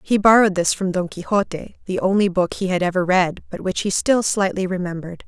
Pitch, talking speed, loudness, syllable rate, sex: 190 Hz, 215 wpm, -19 LUFS, 5.8 syllables/s, female